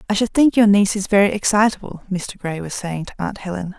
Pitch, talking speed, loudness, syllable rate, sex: 195 Hz, 240 wpm, -18 LUFS, 6.1 syllables/s, female